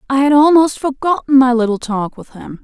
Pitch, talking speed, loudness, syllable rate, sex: 260 Hz, 205 wpm, -13 LUFS, 5.3 syllables/s, female